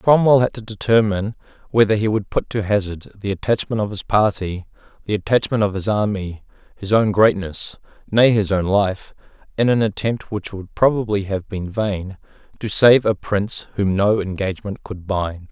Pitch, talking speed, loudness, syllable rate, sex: 105 Hz, 175 wpm, -19 LUFS, 4.9 syllables/s, male